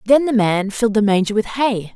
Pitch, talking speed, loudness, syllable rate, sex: 220 Hz, 245 wpm, -17 LUFS, 5.7 syllables/s, female